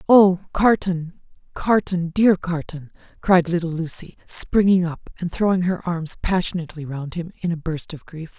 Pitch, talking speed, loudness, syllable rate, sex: 175 Hz, 155 wpm, -21 LUFS, 4.6 syllables/s, female